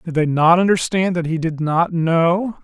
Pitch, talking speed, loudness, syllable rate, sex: 170 Hz, 205 wpm, -17 LUFS, 4.4 syllables/s, male